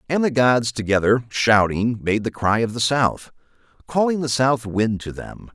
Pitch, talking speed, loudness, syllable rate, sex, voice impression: 120 Hz, 185 wpm, -20 LUFS, 4.4 syllables/s, male, masculine, very adult-like, cool, sincere, calm, slightly mature, slightly wild